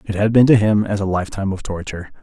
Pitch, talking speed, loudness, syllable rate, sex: 100 Hz, 270 wpm, -17 LUFS, 7.4 syllables/s, male